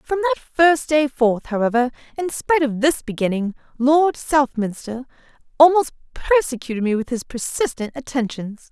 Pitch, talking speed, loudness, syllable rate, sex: 270 Hz, 140 wpm, -20 LUFS, 5.0 syllables/s, female